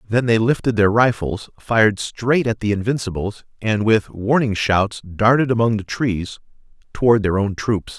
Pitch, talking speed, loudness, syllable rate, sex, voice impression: 110 Hz, 165 wpm, -19 LUFS, 4.6 syllables/s, male, very masculine, middle-aged, very thick, very tensed, very powerful, slightly dark, slightly hard, slightly muffled, fluent, slightly raspy, cool, very intellectual, slightly refreshing, sincere, very calm, very mature, very friendly, very reassuring, very unique, slightly elegant, wild, sweet, lively, kind, slightly modest